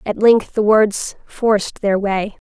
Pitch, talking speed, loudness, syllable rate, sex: 205 Hz, 170 wpm, -16 LUFS, 3.6 syllables/s, female